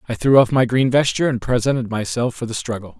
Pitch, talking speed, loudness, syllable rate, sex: 120 Hz, 240 wpm, -18 LUFS, 6.4 syllables/s, male